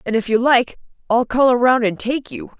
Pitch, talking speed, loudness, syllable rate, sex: 240 Hz, 230 wpm, -17 LUFS, 5.1 syllables/s, female